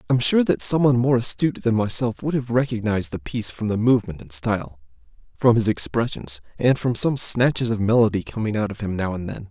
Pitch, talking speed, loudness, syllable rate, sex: 115 Hz, 215 wpm, -21 LUFS, 6.0 syllables/s, male